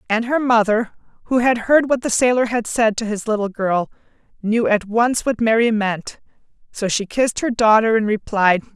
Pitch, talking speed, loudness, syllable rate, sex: 225 Hz, 190 wpm, -18 LUFS, 4.9 syllables/s, female